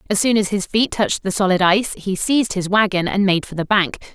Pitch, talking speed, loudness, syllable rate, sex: 195 Hz, 260 wpm, -18 LUFS, 6.1 syllables/s, female